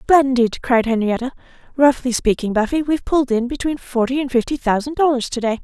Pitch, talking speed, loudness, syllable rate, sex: 255 Hz, 180 wpm, -18 LUFS, 5.8 syllables/s, female